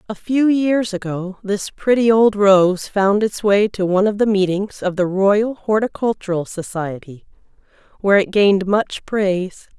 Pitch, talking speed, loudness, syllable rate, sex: 200 Hz, 160 wpm, -17 LUFS, 4.5 syllables/s, female